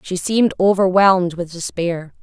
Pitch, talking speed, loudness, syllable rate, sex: 180 Hz, 135 wpm, -17 LUFS, 5.0 syllables/s, female